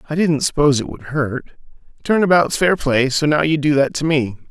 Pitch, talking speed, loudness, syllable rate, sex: 150 Hz, 225 wpm, -17 LUFS, 5.1 syllables/s, male